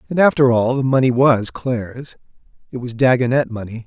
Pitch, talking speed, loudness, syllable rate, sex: 125 Hz, 155 wpm, -16 LUFS, 5.5 syllables/s, male